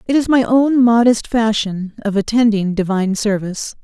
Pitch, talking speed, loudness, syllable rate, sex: 220 Hz, 155 wpm, -16 LUFS, 5.1 syllables/s, female